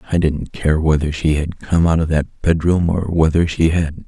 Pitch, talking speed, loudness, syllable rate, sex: 80 Hz, 220 wpm, -17 LUFS, 4.7 syllables/s, male